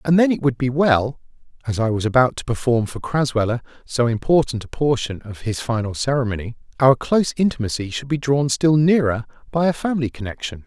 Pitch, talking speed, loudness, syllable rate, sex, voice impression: 130 Hz, 190 wpm, -20 LUFS, 5.8 syllables/s, male, masculine, adult-like, fluent, intellectual, refreshing, slightly calm, friendly